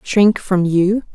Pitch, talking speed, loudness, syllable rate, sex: 195 Hz, 160 wpm, -15 LUFS, 3.1 syllables/s, female